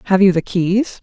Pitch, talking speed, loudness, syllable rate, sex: 190 Hz, 235 wpm, -16 LUFS, 4.8 syllables/s, female